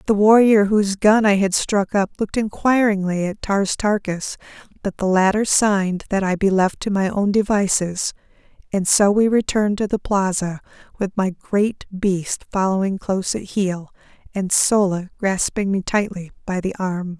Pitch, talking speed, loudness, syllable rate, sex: 195 Hz, 165 wpm, -19 LUFS, 4.6 syllables/s, female